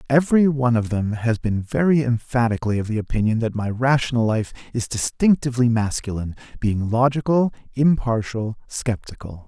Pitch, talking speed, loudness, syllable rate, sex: 120 Hz, 140 wpm, -21 LUFS, 5.5 syllables/s, male